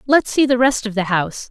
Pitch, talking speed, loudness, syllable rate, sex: 235 Hz, 280 wpm, -17 LUFS, 5.9 syllables/s, female